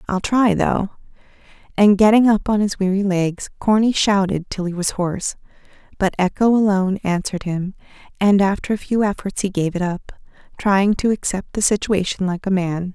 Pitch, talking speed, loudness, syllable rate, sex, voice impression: 195 Hz, 175 wpm, -19 LUFS, 5.2 syllables/s, female, very feminine, very middle-aged, very thin, slightly tensed, slightly weak, bright, very soft, clear, fluent, slightly raspy, cute, very intellectual, very refreshing, sincere, very calm, very friendly, very reassuring, very unique, very elegant, slightly wild, very sweet, lively, very kind, very modest, light